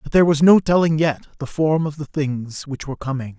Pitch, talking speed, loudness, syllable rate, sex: 150 Hz, 250 wpm, -19 LUFS, 5.6 syllables/s, male